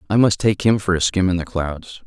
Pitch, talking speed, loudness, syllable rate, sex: 95 Hz, 290 wpm, -19 LUFS, 5.5 syllables/s, male